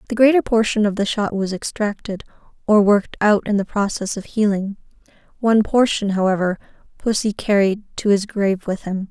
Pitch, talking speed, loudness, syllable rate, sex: 205 Hz, 170 wpm, -19 LUFS, 5.5 syllables/s, female